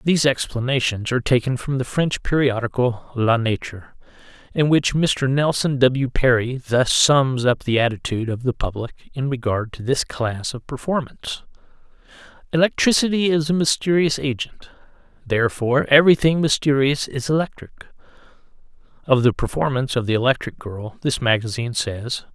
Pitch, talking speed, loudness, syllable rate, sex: 130 Hz, 135 wpm, -20 LUFS, 5.3 syllables/s, male